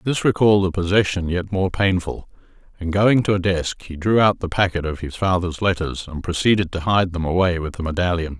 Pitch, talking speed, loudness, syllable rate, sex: 90 Hz, 215 wpm, -20 LUFS, 5.6 syllables/s, male